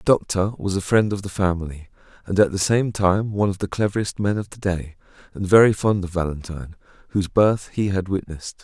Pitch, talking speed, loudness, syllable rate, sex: 95 Hz, 215 wpm, -21 LUFS, 5.9 syllables/s, male